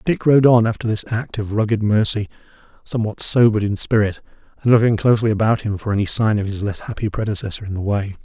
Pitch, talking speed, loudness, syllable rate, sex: 110 Hz, 210 wpm, -18 LUFS, 6.4 syllables/s, male